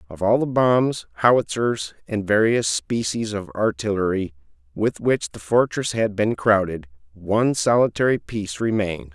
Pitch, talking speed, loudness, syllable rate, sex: 105 Hz, 140 wpm, -21 LUFS, 4.7 syllables/s, male